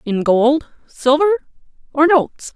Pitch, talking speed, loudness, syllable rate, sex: 285 Hz, 115 wpm, -16 LUFS, 4.3 syllables/s, female